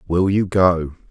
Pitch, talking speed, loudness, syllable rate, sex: 90 Hz, 160 wpm, -18 LUFS, 3.7 syllables/s, male